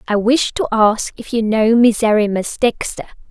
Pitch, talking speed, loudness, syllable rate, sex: 225 Hz, 165 wpm, -16 LUFS, 4.6 syllables/s, female